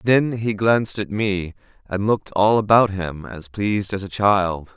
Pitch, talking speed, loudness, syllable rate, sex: 100 Hz, 190 wpm, -20 LUFS, 4.4 syllables/s, male